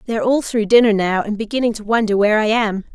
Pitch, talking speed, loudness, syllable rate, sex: 220 Hz, 245 wpm, -17 LUFS, 6.7 syllables/s, female